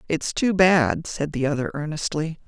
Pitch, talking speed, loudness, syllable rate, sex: 155 Hz, 170 wpm, -22 LUFS, 4.5 syllables/s, female